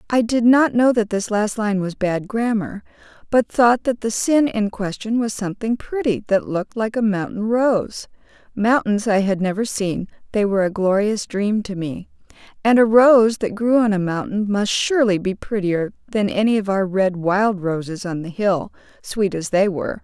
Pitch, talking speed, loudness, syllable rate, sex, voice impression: 205 Hz, 195 wpm, -19 LUFS, 4.7 syllables/s, female, feminine, adult-like, slightly relaxed, bright, slightly raspy, intellectual, friendly, slightly lively, kind